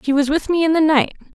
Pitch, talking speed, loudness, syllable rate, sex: 300 Hz, 300 wpm, -17 LUFS, 7.0 syllables/s, female